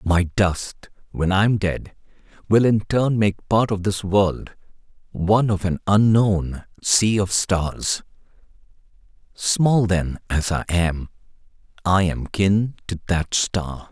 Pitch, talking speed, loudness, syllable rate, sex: 95 Hz, 140 wpm, -20 LUFS, 3.5 syllables/s, male